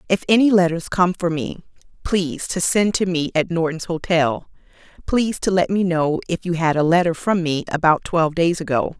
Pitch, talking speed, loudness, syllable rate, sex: 170 Hz, 200 wpm, -19 LUFS, 5.3 syllables/s, female